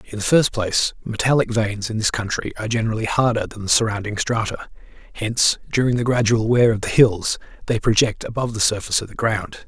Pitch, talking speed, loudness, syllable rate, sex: 110 Hz, 200 wpm, -20 LUFS, 6.1 syllables/s, male